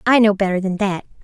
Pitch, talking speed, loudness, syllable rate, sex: 200 Hz, 245 wpm, -18 LUFS, 6.3 syllables/s, female